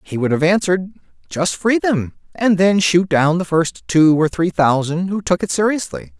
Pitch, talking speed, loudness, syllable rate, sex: 170 Hz, 205 wpm, -17 LUFS, 4.8 syllables/s, male